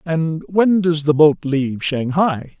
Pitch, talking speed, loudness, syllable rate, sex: 160 Hz, 160 wpm, -17 LUFS, 3.7 syllables/s, male